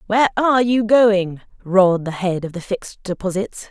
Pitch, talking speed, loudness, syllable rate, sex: 205 Hz, 180 wpm, -18 LUFS, 5.3 syllables/s, female